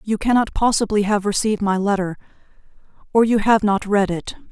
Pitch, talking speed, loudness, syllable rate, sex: 205 Hz, 175 wpm, -19 LUFS, 5.8 syllables/s, female